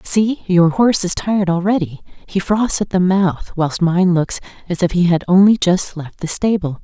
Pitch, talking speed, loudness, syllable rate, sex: 180 Hz, 200 wpm, -16 LUFS, 4.7 syllables/s, female